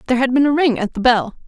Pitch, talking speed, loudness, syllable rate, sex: 250 Hz, 325 wpm, -16 LUFS, 7.6 syllables/s, female